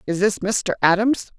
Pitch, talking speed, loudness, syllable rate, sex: 200 Hz, 175 wpm, -20 LUFS, 4.6 syllables/s, female